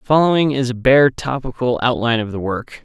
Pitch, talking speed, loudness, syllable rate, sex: 125 Hz, 190 wpm, -17 LUFS, 5.4 syllables/s, male